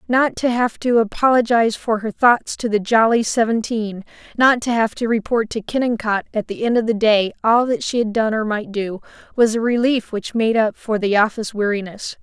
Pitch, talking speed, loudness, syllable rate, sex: 225 Hz, 210 wpm, -18 LUFS, 5.2 syllables/s, female